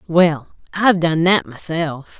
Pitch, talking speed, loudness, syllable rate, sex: 170 Hz, 135 wpm, -17 LUFS, 4.0 syllables/s, female